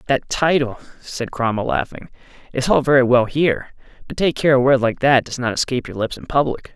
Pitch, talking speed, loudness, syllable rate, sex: 130 Hz, 215 wpm, -18 LUFS, 5.7 syllables/s, male